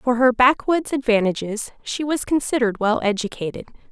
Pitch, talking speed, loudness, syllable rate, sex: 240 Hz, 140 wpm, -20 LUFS, 5.4 syllables/s, female